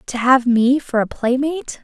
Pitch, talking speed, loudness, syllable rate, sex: 255 Hz, 195 wpm, -17 LUFS, 4.7 syllables/s, female